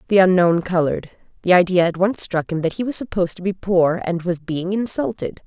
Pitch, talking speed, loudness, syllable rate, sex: 180 Hz, 220 wpm, -19 LUFS, 5.6 syllables/s, female